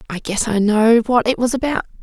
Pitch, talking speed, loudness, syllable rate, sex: 230 Hz, 235 wpm, -17 LUFS, 5.4 syllables/s, female